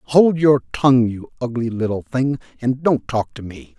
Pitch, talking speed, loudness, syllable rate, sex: 120 Hz, 190 wpm, -19 LUFS, 4.7 syllables/s, male